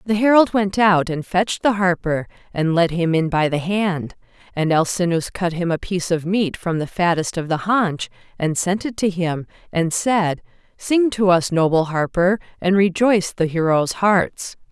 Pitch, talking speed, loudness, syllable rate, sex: 180 Hz, 190 wpm, -19 LUFS, 4.5 syllables/s, female